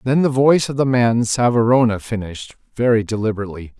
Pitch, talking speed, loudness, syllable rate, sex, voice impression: 115 Hz, 160 wpm, -17 LUFS, 6.4 syllables/s, male, very masculine, adult-like, middle-aged, slightly thick, slightly tensed, slightly weak, bright, soft, clear, slightly fluent, very cute, very cool, intellectual, very sincere, very calm, very mature, very friendly, reassuring, very unique, elegant, sweet, lively, very kind